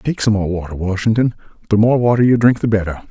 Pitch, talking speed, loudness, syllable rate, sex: 110 Hz, 215 wpm, -16 LUFS, 6.4 syllables/s, male